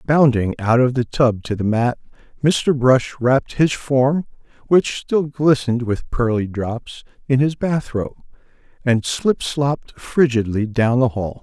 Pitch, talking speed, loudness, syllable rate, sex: 130 Hz, 160 wpm, -18 LUFS, 4.0 syllables/s, male